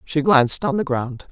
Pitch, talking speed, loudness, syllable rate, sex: 165 Hz, 230 wpm, -18 LUFS, 5.0 syllables/s, female